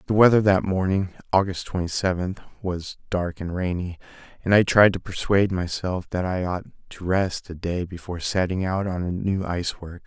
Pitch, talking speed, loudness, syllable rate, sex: 90 Hz, 185 wpm, -24 LUFS, 5.1 syllables/s, male